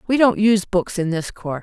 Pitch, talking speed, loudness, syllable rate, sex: 195 Hz, 260 wpm, -19 LUFS, 6.1 syllables/s, female